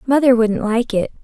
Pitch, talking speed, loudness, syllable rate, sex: 235 Hz, 195 wpm, -16 LUFS, 4.9 syllables/s, female